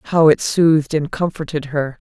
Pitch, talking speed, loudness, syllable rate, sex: 155 Hz, 175 wpm, -17 LUFS, 4.6 syllables/s, female